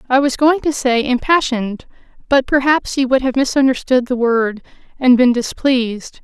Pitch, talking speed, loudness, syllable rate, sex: 260 Hz, 165 wpm, -15 LUFS, 4.9 syllables/s, female